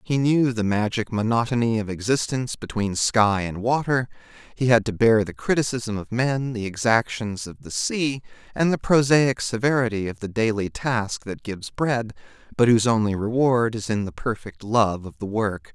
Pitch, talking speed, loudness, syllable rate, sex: 115 Hz, 175 wpm, -23 LUFS, 4.9 syllables/s, male